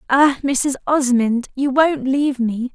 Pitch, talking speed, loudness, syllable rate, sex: 265 Hz, 155 wpm, -18 LUFS, 3.9 syllables/s, female